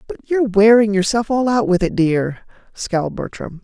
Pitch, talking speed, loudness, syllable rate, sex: 210 Hz, 180 wpm, -17 LUFS, 5.1 syllables/s, female